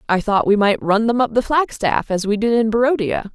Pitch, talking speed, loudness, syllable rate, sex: 220 Hz, 250 wpm, -17 LUFS, 5.4 syllables/s, female